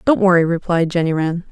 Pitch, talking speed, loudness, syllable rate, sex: 175 Hz, 200 wpm, -16 LUFS, 5.8 syllables/s, female